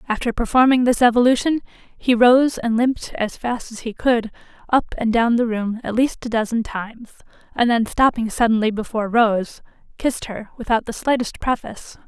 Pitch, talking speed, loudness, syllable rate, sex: 235 Hz, 175 wpm, -19 LUFS, 5.3 syllables/s, female